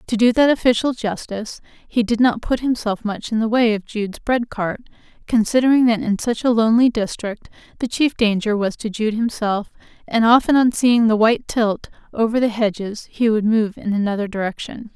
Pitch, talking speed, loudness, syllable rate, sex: 225 Hz, 195 wpm, -19 LUFS, 5.3 syllables/s, female